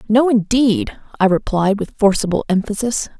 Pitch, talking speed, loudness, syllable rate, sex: 215 Hz, 130 wpm, -17 LUFS, 4.8 syllables/s, female